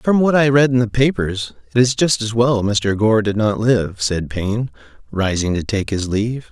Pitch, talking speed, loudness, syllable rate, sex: 110 Hz, 220 wpm, -17 LUFS, 4.8 syllables/s, male